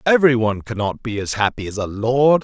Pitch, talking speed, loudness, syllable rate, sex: 120 Hz, 220 wpm, -19 LUFS, 5.9 syllables/s, male